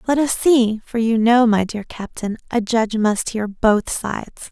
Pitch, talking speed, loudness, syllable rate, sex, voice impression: 225 Hz, 200 wpm, -18 LUFS, 4.5 syllables/s, female, feminine, slightly young, bright, slightly soft, clear, fluent, slightly cute, friendly, unique, elegant, kind, light